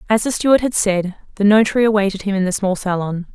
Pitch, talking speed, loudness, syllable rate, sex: 200 Hz, 235 wpm, -17 LUFS, 6.6 syllables/s, female